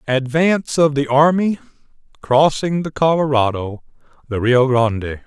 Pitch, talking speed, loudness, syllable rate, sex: 140 Hz, 90 wpm, -17 LUFS, 4.5 syllables/s, male